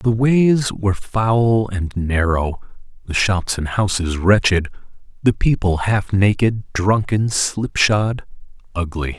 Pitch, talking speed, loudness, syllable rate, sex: 100 Hz, 120 wpm, -18 LUFS, 3.6 syllables/s, male